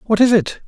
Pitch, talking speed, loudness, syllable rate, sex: 215 Hz, 265 wpm, -15 LUFS, 5.4 syllables/s, male